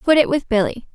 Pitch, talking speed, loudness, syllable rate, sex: 265 Hz, 255 wpm, -18 LUFS, 5.8 syllables/s, female